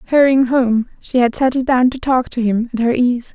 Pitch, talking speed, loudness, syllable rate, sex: 250 Hz, 235 wpm, -16 LUFS, 5.1 syllables/s, female